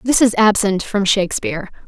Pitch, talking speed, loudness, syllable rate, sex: 205 Hz, 160 wpm, -16 LUFS, 5.5 syllables/s, female